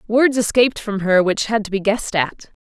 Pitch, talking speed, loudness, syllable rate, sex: 210 Hz, 230 wpm, -18 LUFS, 5.5 syllables/s, female